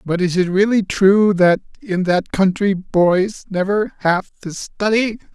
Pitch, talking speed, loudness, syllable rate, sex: 195 Hz, 155 wpm, -17 LUFS, 3.9 syllables/s, male